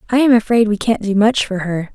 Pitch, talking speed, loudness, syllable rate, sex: 215 Hz, 280 wpm, -15 LUFS, 5.8 syllables/s, female